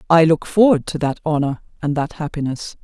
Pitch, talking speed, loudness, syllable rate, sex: 155 Hz, 190 wpm, -18 LUFS, 5.5 syllables/s, female